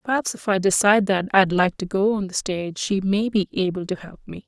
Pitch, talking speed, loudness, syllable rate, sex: 195 Hz, 255 wpm, -21 LUFS, 5.8 syllables/s, female